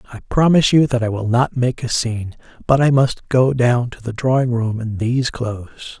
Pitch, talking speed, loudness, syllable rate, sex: 120 Hz, 220 wpm, -17 LUFS, 5.6 syllables/s, male